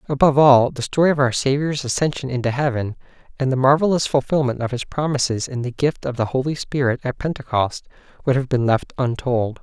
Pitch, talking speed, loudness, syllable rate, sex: 135 Hz, 195 wpm, -20 LUFS, 5.9 syllables/s, male